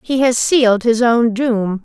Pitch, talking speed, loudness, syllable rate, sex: 235 Hz, 195 wpm, -14 LUFS, 4.1 syllables/s, female